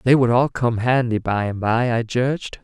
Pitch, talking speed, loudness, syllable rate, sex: 120 Hz, 230 wpm, -20 LUFS, 4.8 syllables/s, male